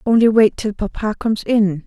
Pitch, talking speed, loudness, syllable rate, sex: 215 Hz, 195 wpm, -17 LUFS, 5.3 syllables/s, female